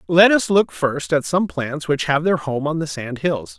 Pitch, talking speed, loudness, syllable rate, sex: 155 Hz, 250 wpm, -19 LUFS, 4.4 syllables/s, male